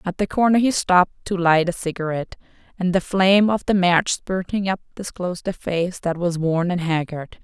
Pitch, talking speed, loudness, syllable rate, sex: 180 Hz, 195 wpm, -20 LUFS, 5.3 syllables/s, female